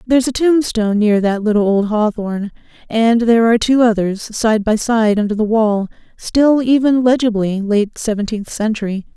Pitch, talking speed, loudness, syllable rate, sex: 220 Hz, 165 wpm, -15 LUFS, 4.9 syllables/s, female